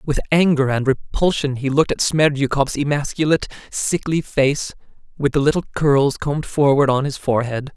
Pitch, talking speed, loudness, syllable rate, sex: 140 Hz, 155 wpm, -19 LUFS, 5.3 syllables/s, male